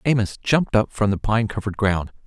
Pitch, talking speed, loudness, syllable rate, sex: 105 Hz, 210 wpm, -21 LUFS, 6.0 syllables/s, male